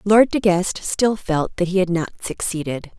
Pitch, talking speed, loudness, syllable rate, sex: 185 Hz, 200 wpm, -20 LUFS, 4.4 syllables/s, female